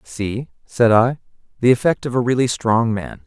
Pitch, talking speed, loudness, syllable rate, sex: 115 Hz, 185 wpm, -18 LUFS, 4.6 syllables/s, male